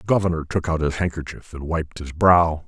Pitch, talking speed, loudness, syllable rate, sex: 80 Hz, 225 wpm, -21 LUFS, 5.4 syllables/s, male